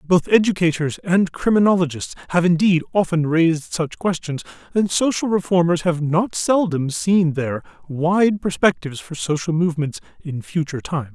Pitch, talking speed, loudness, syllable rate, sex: 170 Hz, 140 wpm, -19 LUFS, 5.1 syllables/s, male